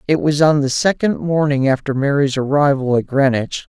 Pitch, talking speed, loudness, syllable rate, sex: 140 Hz, 175 wpm, -16 LUFS, 5.1 syllables/s, male